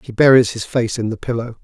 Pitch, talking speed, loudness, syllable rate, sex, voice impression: 120 Hz, 255 wpm, -17 LUFS, 6.1 syllables/s, male, masculine, adult-like, tensed, bright, clear, fluent, intellectual, friendly, lively, light